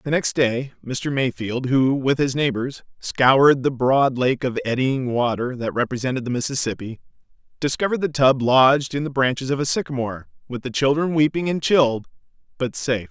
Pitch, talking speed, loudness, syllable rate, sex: 130 Hz, 175 wpm, -20 LUFS, 5.3 syllables/s, male